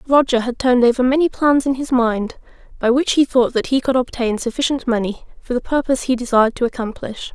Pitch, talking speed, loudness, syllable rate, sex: 250 Hz, 210 wpm, -18 LUFS, 6.0 syllables/s, female